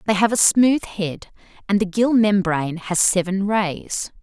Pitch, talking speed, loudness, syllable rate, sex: 200 Hz, 170 wpm, -19 LUFS, 4.1 syllables/s, female